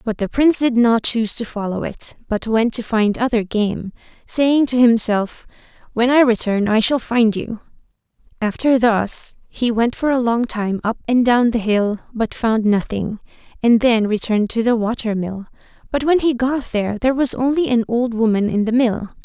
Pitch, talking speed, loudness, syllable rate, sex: 230 Hz, 195 wpm, -18 LUFS, 4.8 syllables/s, female